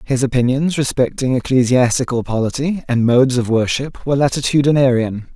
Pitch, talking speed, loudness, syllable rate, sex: 130 Hz, 125 wpm, -16 LUFS, 5.6 syllables/s, male